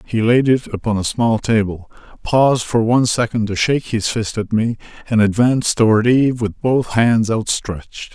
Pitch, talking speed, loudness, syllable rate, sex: 115 Hz, 185 wpm, -17 LUFS, 5.1 syllables/s, male